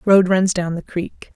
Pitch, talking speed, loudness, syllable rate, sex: 180 Hz, 220 wpm, -18 LUFS, 4.1 syllables/s, female